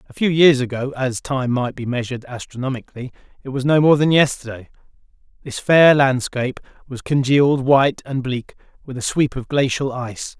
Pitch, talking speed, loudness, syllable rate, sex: 130 Hz, 160 wpm, -18 LUFS, 5.6 syllables/s, male